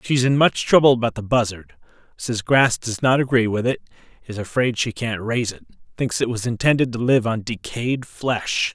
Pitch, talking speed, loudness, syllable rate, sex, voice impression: 120 Hz, 205 wpm, -20 LUFS, 5.3 syllables/s, male, very masculine, slightly middle-aged, thick, very tensed, powerful, very bright, slightly soft, very clear, very fluent, raspy, cool, intellectual, very refreshing, sincere, slightly calm, very friendly, very reassuring, very unique, slightly elegant, wild, sweet, very lively, kind, intense